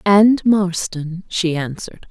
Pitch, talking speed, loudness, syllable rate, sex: 185 Hz, 115 wpm, -17 LUFS, 3.6 syllables/s, female